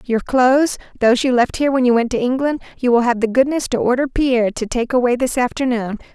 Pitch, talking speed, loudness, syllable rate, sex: 250 Hz, 215 wpm, -17 LUFS, 6.3 syllables/s, female